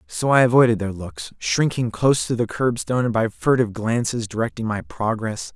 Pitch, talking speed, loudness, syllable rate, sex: 115 Hz, 185 wpm, -21 LUFS, 5.5 syllables/s, male